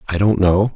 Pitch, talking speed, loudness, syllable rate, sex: 95 Hz, 240 wpm, -16 LUFS, 5.3 syllables/s, male